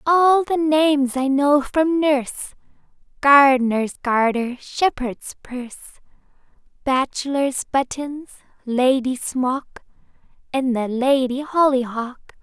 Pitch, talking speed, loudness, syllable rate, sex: 270 Hz, 90 wpm, -19 LUFS, 3.8 syllables/s, female